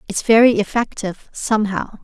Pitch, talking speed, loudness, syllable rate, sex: 215 Hz, 120 wpm, -17 LUFS, 5.6 syllables/s, female